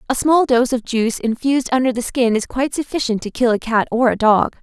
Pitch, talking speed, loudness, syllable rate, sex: 245 Hz, 245 wpm, -17 LUFS, 6.0 syllables/s, female